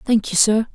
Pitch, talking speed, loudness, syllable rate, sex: 215 Hz, 240 wpm, -17 LUFS, 5.0 syllables/s, female